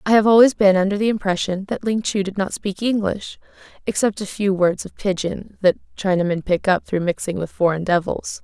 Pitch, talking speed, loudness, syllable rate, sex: 195 Hz, 205 wpm, -20 LUFS, 5.4 syllables/s, female